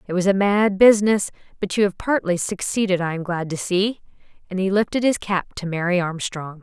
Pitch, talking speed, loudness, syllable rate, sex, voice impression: 190 Hz, 210 wpm, -21 LUFS, 5.5 syllables/s, female, feminine, slightly gender-neutral, very adult-like, slightly middle-aged, slightly thin, tensed, slightly powerful, bright, hard, very clear, fluent, cool, intellectual, sincere, calm, slightly friendly, slightly reassuring, elegant, slightly lively, slightly strict